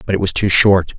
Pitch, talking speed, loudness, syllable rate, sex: 95 Hz, 305 wpm, -13 LUFS, 5.8 syllables/s, male